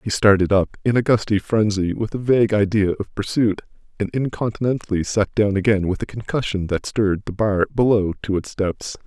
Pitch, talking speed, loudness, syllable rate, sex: 105 Hz, 190 wpm, -20 LUFS, 5.4 syllables/s, male